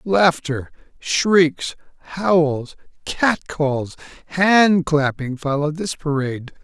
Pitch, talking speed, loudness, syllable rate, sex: 160 Hz, 80 wpm, -19 LUFS, 3.1 syllables/s, male